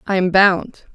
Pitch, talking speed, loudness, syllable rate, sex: 195 Hz, 190 wpm, -15 LUFS, 4.0 syllables/s, female